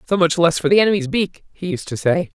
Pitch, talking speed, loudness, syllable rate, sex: 175 Hz, 275 wpm, -18 LUFS, 6.3 syllables/s, female